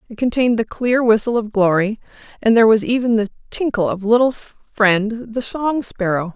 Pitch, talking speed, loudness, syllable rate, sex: 225 Hz, 180 wpm, -17 LUFS, 5.1 syllables/s, female